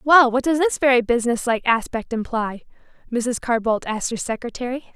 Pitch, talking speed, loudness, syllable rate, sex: 240 Hz, 170 wpm, -21 LUFS, 5.7 syllables/s, female